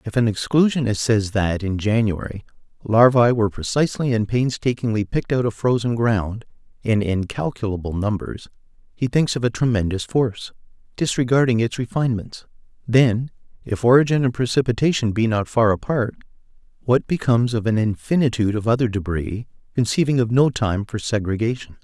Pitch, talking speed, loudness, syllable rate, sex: 115 Hz, 140 wpm, -20 LUFS, 5.5 syllables/s, male